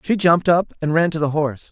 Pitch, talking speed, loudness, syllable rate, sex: 160 Hz, 280 wpm, -18 LUFS, 6.6 syllables/s, male